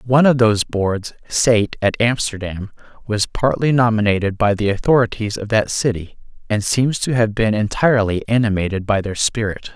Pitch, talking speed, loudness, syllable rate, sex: 110 Hz, 160 wpm, -18 LUFS, 5.1 syllables/s, male